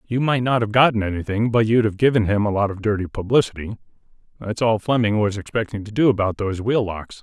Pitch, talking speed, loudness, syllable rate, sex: 110 Hz, 225 wpm, -20 LUFS, 6.2 syllables/s, male